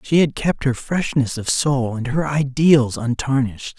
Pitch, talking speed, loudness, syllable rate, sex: 135 Hz, 175 wpm, -19 LUFS, 4.3 syllables/s, male